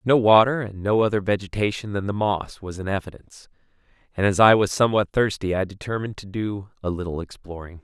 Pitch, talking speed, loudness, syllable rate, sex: 100 Hz, 190 wpm, -22 LUFS, 6.1 syllables/s, male